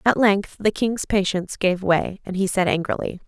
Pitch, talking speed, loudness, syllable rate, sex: 195 Hz, 200 wpm, -22 LUFS, 4.9 syllables/s, female